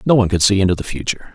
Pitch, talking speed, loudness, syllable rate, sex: 100 Hz, 310 wpm, -16 LUFS, 8.8 syllables/s, male